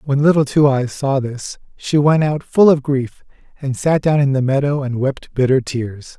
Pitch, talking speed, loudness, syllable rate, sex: 135 Hz, 215 wpm, -16 LUFS, 4.5 syllables/s, male